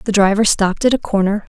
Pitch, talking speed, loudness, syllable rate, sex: 205 Hz, 230 wpm, -15 LUFS, 6.2 syllables/s, female